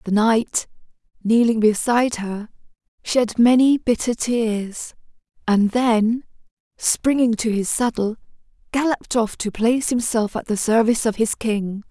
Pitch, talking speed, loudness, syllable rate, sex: 225 Hz, 130 wpm, -20 LUFS, 4.3 syllables/s, female